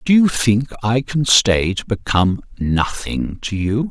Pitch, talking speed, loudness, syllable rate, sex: 115 Hz, 170 wpm, -18 LUFS, 3.9 syllables/s, male